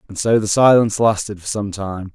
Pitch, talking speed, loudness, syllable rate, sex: 105 Hz, 225 wpm, -17 LUFS, 5.6 syllables/s, male